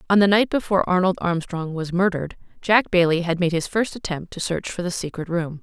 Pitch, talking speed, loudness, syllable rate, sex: 180 Hz, 225 wpm, -21 LUFS, 5.9 syllables/s, female